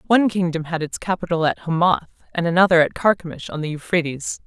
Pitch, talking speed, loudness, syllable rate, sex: 170 Hz, 190 wpm, -20 LUFS, 6.3 syllables/s, female